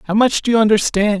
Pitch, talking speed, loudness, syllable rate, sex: 215 Hz, 250 wpm, -15 LUFS, 6.5 syllables/s, male